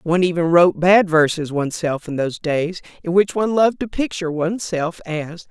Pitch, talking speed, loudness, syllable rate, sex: 170 Hz, 185 wpm, -19 LUFS, 5.7 syllables/s, female